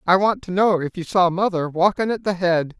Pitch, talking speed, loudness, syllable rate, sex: 185 Hz, 260 wpm, -20 LUFS, 5.3 syllables/s, male